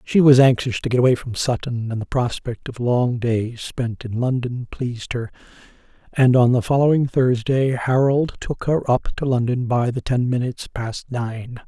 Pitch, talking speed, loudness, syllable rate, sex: 125 Hz, 185 wpm, -20 LUFS, 4.7 syllables/s, male